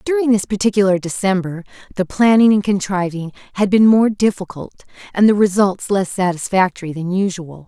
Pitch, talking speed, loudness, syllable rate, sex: 195 Hz, 150 wpm, -16 LUFS, 5.5 syllables/s, female